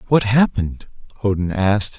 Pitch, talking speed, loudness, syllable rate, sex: 105 Hz, 120 wpm, -18 LUFS, 5.5 syllables/s, male